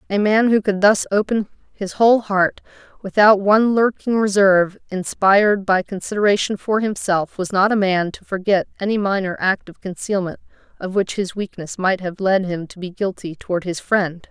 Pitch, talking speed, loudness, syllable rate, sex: 195 Hz, 180 wpm, -18 LUFS, 5.1 syllables/s, female